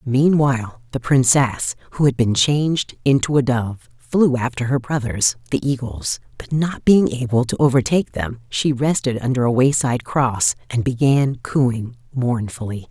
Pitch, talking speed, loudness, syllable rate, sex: 125 Hz, 155 wpm, -19 LUFS, 4.5 syllables/s, female